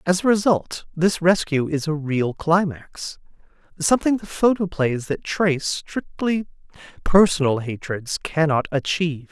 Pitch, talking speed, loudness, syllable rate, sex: 165 Hz, 120 wpm, -21 LUFS, 4.3 syllables/s, male